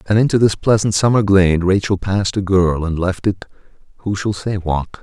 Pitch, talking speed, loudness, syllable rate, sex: 95 Hz, 205 wpm, -16 LUFS, 5.4 syllables/s, male